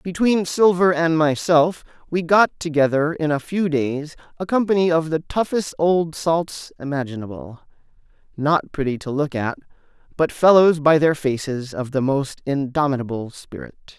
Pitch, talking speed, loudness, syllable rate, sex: 155 Hz, 140 wpm, -20 LUFS, 4.6 syllables/s, male